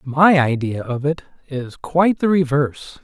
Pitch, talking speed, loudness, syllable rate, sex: 145 Hz, 160 wpm, -18 LUFS, 4.6 syllables/s, male